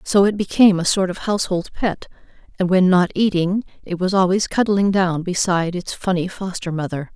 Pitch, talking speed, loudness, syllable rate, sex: 185 Hz, 185 wpm, -19 LUFS, 5.5 syllables/s, female